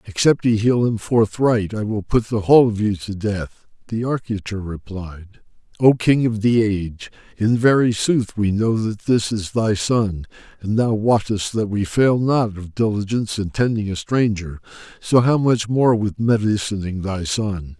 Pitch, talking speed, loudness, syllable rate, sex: 105 Hz, 180 wpm, -19 LUFS, 4.4 syllables/s, male